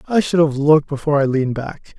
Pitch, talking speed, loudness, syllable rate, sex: 150 Hz, 240 wpm, -17 LUFS, 6.7 syllables/s, male